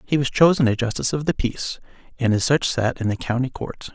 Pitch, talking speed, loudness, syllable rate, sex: 125 Hz, 245 wpm, -21 LUFS, 6.2 syllables/s, male